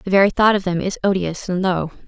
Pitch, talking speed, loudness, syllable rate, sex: 185 Hz, 260 wpm, -19 LUFS, 5.9 syllables/s, female